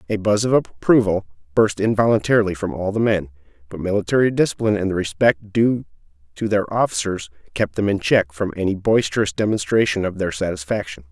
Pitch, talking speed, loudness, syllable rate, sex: 100 Hz, 165 wpm, -20 LUFS, 5.9 syllables/s, male